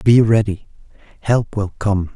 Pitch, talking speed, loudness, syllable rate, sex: 105 Hz, 140 wpm, -17 LUFS, 4.0 syllables/s, male